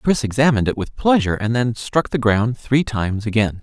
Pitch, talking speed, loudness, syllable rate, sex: 115 Hz, 215 wpm, -19 LUFS, 5.6 syllables/s, male